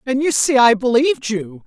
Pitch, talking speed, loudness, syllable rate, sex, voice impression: 245 Hz, 215 wpm, -16 LUFS, 5.2 syllables/s, female, feminine, gender-neutral, middle-aged, thin, tensed, very powerful, slightly dark, hard, slightly muffled, fluent, slightly raspy, cool, slightly intellectual, slightly refreshing, slightly sincere, slightly calm, slightly friendly, slightly reassuring, very unique, very wild, slightly sweet, very lively, very strict, intense, very sharp